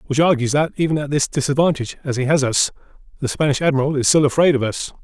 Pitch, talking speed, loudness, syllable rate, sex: 140 Hz, 225 wpm, -18 LUFS, 6.9 syllables/s, male